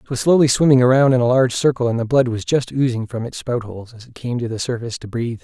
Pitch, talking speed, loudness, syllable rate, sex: 125 Hz, 300 wpm, -18 LUFS, 6.9 syllables/s, male